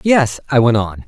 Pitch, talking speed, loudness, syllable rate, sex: 125 Hz, 225 wpm, -15 LUFS, 4.7 syllables/s, male